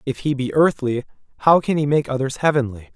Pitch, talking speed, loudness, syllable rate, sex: 140 Hz, 205 wpm, -19 LUFS, 5.9 syllables/s, male